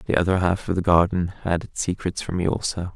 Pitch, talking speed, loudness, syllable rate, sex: 90 Hz, 245 wpm, -23 LUFS, 5.8 syllables/s, male